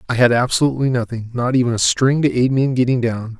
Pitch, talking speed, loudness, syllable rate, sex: 125 Hz, 250 wpm, -17 LUFS, 6.6 syllables/s, male